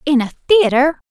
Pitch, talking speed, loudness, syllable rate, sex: 280 Hz, 165 wpm, -14 LUFS, 4.4 syllables/s, female